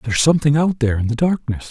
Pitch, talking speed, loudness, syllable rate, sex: 140 Hz, 280 wpm, -17 LUFS, 8.2 syllables/s, male